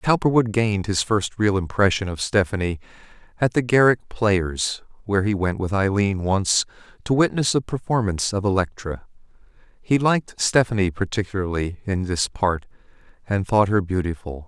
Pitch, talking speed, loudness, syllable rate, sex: 100 Hz, 145 wpm, -22 LUFS, 5.1 syllables/s, male